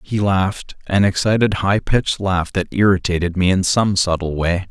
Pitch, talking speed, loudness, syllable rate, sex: 95 Hz, 180 wpm, -18 LUFS, 4.9 syllables/s, male